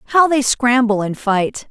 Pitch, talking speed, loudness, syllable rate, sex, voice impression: 240 Hz, 175 wpm, -16 LUFS, 4.2 syllables/s, female, very feminine, slightly young, adult-like, very thin, very tensed, slightly powerful, bright, slightly hard, very clear, very fluent, slightly cute, cool, very intellectual, refreshing, sincere, calm, friendly, slightly reassuring, unique, elegant, slightly sweet, slightly strict, slightly intense, slightly sharp